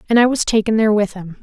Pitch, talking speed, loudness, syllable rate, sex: 215 Hz, 295 wpm, -16 LUFS, 7.2 syllables/s, female